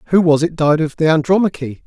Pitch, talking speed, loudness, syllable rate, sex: 160 Hz, 225 wpm, -15 LUFS, 7.8 syllables/s, male